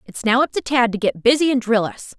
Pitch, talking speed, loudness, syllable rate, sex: 240 Hz, 305 wpm, -18 LUFS, 5.8 syllables/s, female